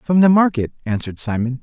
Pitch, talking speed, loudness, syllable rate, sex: 140 Hz, 185 wpm, -18 LUFS, 6.2 syllables/s, male